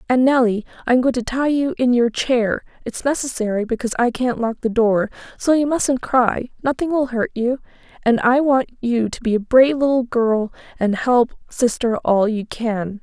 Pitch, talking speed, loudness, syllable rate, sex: 240 Hz, 195 wpm, -19 LUFS, 4.7 syllables/s, female